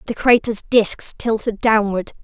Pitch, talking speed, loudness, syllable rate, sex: 220 Hz, 135 wpm, -17 LUFS, 4.1 syllables/s, female